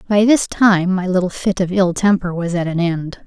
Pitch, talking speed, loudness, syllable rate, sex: 185 Hz, 240 wpm, -16 LUFS, 4.9 syllables/s, female